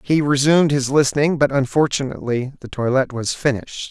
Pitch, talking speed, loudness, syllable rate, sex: 135 Hz, 155 wpm, -18 LUFS, 5.9 syllables/s, male